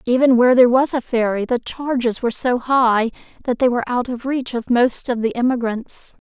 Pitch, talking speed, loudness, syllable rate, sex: 245 Hz, 210 wpm, -18 LUFS, 5.5 syllables/s, female